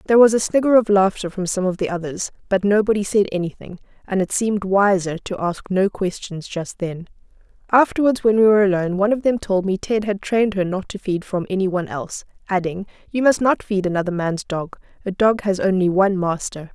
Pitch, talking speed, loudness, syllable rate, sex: 195 Hz, 215 wpm, -20 LUFS, 5.9 syllables/s, female